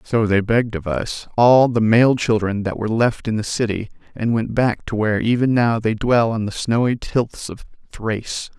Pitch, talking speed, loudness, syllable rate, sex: 110 Hz, 210 wpm, -19 LUFS, 4.9 syllables/s, male